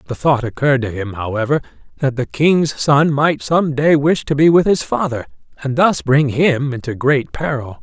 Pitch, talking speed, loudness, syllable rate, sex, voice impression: 140 Hz, 200 wpm, -16 LUFS, 4.8 syllables/s, male, masculine, slightly middle-aged, slightly thick, slightly intellectual, sincere, slightly wild, slightly kind